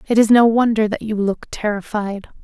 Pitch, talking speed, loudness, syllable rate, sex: 215 Hz, 195 wpm, -17 LUFS, 5.2 syllables/s, female